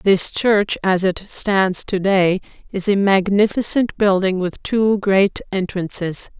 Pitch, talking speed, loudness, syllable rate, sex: 195 Hz, 130 wpm, -18 LUFS, 3.6 syllables/s, female